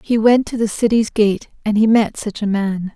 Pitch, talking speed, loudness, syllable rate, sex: 215 Hz, 245 wpm, -17 LUFS, 4.8 syllables/s, female